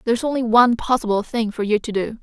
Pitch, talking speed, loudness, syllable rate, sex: 225 Hz, 245 wpm, -19 LUFS, 6.7 syllables/s, female